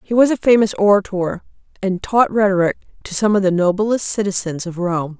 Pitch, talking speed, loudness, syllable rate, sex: 195 Hz, 185 wpm, -17 LUFS, 5.4 syllables/s, female